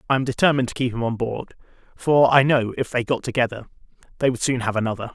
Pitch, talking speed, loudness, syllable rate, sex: 125 Hz, 235 wpm, -21 LUFS, 6.9 syllables/s, male